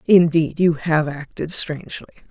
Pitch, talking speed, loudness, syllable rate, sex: 155 Hz, 130 wpm, -19 LUFS, 4.5 syllables/s, female